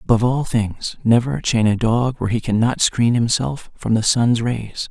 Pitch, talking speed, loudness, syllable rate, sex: 115 Hz, 195 wpm, -18 LUFS, 4.7 syllables/s, male